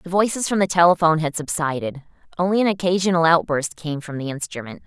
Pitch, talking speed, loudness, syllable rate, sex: 165 Hz, 185 wpm, -20 LUFS, 6.3 syllables/s, female